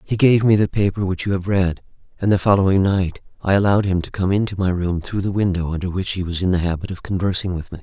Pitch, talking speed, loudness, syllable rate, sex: 95 Hz, 270 wpm, -19 LUFS, 6.4 syllables/s, male